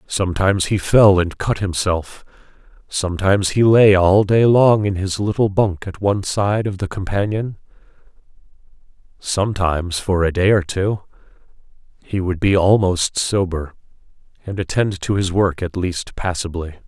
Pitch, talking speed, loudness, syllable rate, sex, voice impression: 95 Hz, 145 wpm, -18 LUFS, 4.7 syllables/s, male, masculine, middle-aged, thick, powerful, clear, slightly halting, cool, calm, mature, friendly, wild, lively, slightly strict